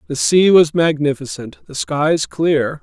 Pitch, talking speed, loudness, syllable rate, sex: 155 Hz, 150 wpm, -15 LUFS, 3.9 syllables/s, male